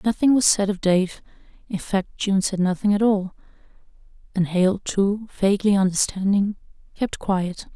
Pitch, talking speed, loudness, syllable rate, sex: 195 Hz, 140 wpm, -21 LUFS, 4.6 syllables/s, female